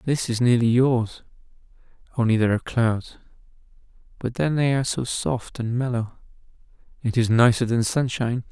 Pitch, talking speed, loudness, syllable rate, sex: 120 Hz, 150 wpm, -22 LUFS, 5.4 syllables/s, male